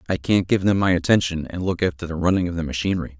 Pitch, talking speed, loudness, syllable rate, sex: 85 Hz, 265 wpm, -21 LUFS, 7.0 syllables/s, male